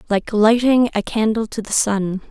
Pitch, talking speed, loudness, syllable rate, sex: 220 Hz, 180 wpm, -17 LUFS, 4.5 syllables/s, female